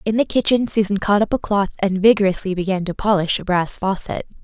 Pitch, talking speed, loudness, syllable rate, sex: 200 Hz, 215 wpm, -19 LUFS, 5.9 syllables/s, female